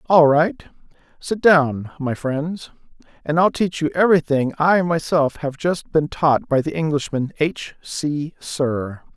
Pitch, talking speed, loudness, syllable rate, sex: 155 Hz, 150 wpm, -19 LUFS, 3.8 syllables/s, male